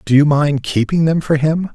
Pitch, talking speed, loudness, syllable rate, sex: 150 Hz, 240 wpm, -15 LUFS, 4.9 syllables/s, male